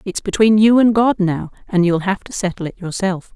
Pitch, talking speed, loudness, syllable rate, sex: 195 Hz, 230 wpm, -16 LUFS, 5.2 syllables/s, female